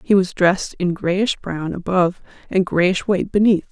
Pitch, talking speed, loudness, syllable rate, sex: 185 Hz, 180 wpm, -19 LUFS, 4.8 syllables/s, female